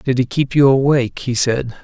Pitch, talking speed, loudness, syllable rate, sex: 130 Hz, 230 wpm, -16 LUFS, 5.1 syllables/s, male